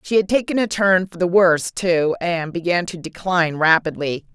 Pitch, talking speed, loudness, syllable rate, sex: 175 Hz, 195 wpm, -19 LUFS, 5.1 syllables/s, female